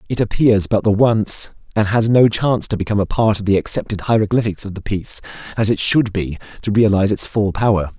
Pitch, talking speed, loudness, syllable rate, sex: 105 Hz, 220 wpm, -17 LUFS, 6.0 syllables/s, male